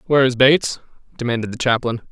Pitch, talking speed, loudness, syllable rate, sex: 125 Hz, 140 wpm, -18 LUFS, 6.4 syllables/s, male